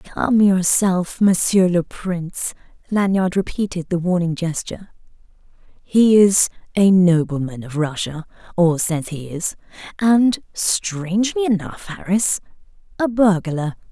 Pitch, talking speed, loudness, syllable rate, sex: 185 Hz, 105 wpm, -18 LUFS, 4.0 syllables/s, female